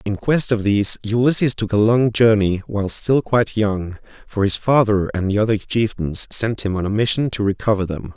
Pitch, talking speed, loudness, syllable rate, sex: 105 Hz, 205 wpm, -18 LUFS, 5.2 syllables/s, male